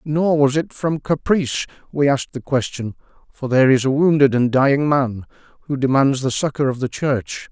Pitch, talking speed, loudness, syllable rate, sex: 140 Hz, 190 wpm, -18 LUFS, 5.2 syllables/s, male